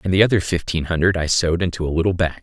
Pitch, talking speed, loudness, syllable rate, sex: 85 Hz, 270 wpm, -19 LUFS, 7.6 syllables/s, male